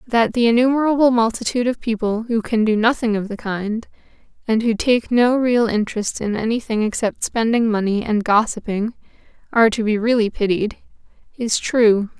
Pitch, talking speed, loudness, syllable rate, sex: 225 Hz, 160 wpm, -19 LUFS, 5.2 syllables/s, female